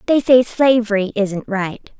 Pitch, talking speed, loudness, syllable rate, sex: 220 Hz, 150 wpm, -16 LUFS, 4.0 syllables/s, female